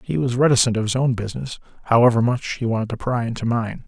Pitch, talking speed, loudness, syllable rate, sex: 120 Hz, 230 wpm, -20 LUFS, 6.7 syllables/s, male